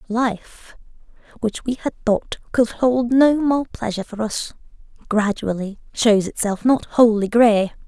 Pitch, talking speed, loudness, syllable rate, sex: 225 Hz, 135 wpm, -19 LUFS, 4.1 syllables/s, female